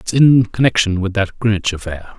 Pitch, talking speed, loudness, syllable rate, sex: 105 Hz, 190 wpm, -15 LUFS, 5.1 syllables/s, male